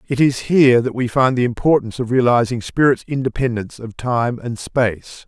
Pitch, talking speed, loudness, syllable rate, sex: 125 Hz, 180 wpm, -17 LUFS, 5.5 syllables/s, male